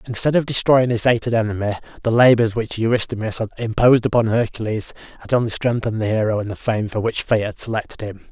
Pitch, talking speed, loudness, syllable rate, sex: 115 Hz, 200 wpm, -19 LUFS, 6.3 syllables/s, male